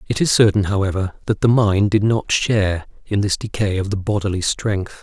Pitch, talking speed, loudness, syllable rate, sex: 100 Hz, 205 wpm, -18 LUFS, 5.2 syllables/s, male